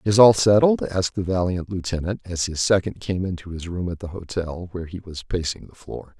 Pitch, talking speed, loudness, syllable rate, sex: 90 Hz, 225 wpm, -22 LUFS, 5.5 syllables/s, male